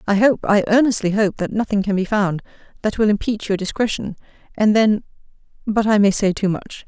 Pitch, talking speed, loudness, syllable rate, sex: 205 Hz, 190 wpm, -18 LUFS, 5.5 syllables/s, female